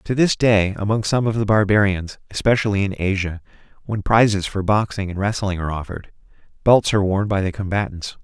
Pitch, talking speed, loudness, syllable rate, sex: 100 Hz, 180 wpm, -19 LUFS, 5.8 syllables/s, male